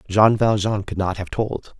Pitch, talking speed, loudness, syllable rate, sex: 100 Hz, 200 wpm, -20 LUFS, 4.4 syllables/s, male